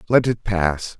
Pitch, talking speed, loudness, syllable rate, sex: 100 Hz, 180 wpm, -20 LUFS, 3.7 syllables/s, male